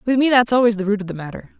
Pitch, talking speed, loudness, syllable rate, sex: 220 Hz, 340 wpm, -17 LUFS, 7.8 syllables/s, female